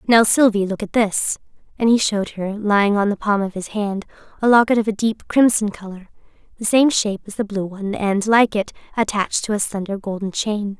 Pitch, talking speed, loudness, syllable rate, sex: 210 Hz, 215 wpm, -19 LUFS, 5.6 syllables/s, female